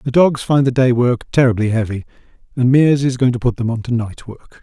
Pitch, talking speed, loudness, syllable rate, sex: 125 Hz, 245 wpm, -16 LUFS, 5.7 syllables/s, male